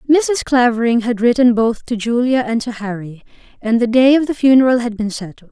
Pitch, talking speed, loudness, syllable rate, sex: 235 Hz, 205 wpm, -15 LUFS, 5.5 syllables/s, female